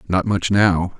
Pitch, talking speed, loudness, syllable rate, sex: 90 Hz, 180 wpm, -18 LUFS, 3.7 syllables/s, male